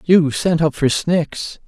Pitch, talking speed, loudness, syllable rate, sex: 155 Hz, 180 wpm, -17 LUFS, 3.3 syllables/s, male